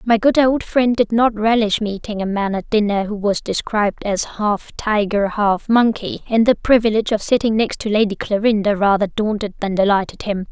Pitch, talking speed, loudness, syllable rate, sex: 210 Hz, 195 wpm, -18 LUFS, 5.1 syllables/s, female